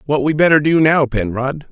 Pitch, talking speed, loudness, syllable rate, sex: 145 Hz, 210 wpm, -15 LUFS, 5.1 syllables/s, male